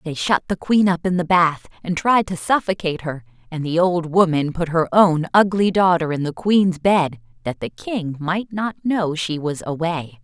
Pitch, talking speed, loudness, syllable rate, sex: 170 Hz, 205 wpm, -19 LUFS, 4.5 syllables/s, female